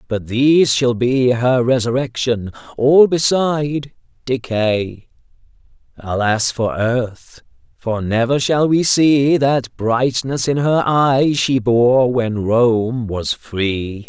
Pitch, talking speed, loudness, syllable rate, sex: 125 Hz, 115 wpm, -16 LUFS, 3.2 syllables/s, male